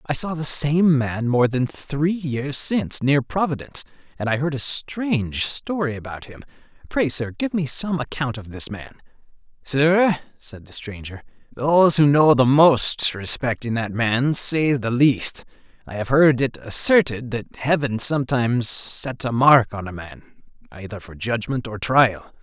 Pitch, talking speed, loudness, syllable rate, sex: 130 Hz, 170 wpm, -20 LUFS, 4.3 syllables/s, male